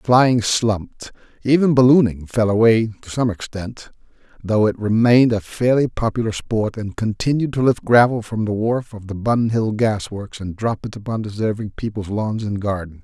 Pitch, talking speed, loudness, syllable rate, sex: 110 Hz, 180 wpm, -19 LUFS, 4.8 syllables/s, male